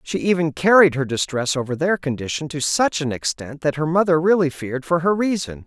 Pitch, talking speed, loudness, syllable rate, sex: 155 Hz, 210 wpm, -20 LUFS, 5.6 syllables/s, male